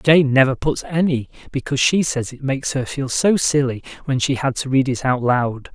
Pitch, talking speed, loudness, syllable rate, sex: 135 Hz, 220 wpm, -19 LUFS, 5.1 syllables/s, male